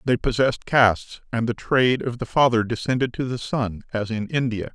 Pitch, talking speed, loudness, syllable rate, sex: 120 Hz, 200 wpm, -22 LUFS, 5.4 syllables/s, male